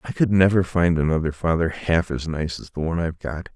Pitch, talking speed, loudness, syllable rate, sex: 85 Hz, 235 wpm, -22 LUFS, 6.0 syllables/s, male